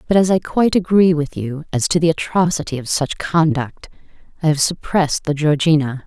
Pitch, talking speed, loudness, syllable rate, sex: 155 Hz, 190 wpm, -17 LUFS, 5.5 syllables/s, female